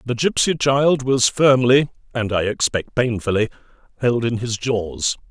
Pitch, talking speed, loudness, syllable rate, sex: 120 Hz, 145 wpm, -19 LUFS, 4.2 syllables/s, male